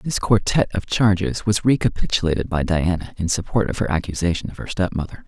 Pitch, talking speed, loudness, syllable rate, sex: 95 Hz, 180 wpm, -21 LUFS, 6.0 syllables/s, male